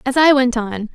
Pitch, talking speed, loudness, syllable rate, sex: 250 Hz, 255 wpm, -15 LUFS, 4.8 syllables/s, female